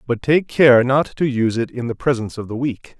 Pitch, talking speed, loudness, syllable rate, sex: 125 Hz, 260 wpm, -18 LUFS, 5.6 syllables/s, male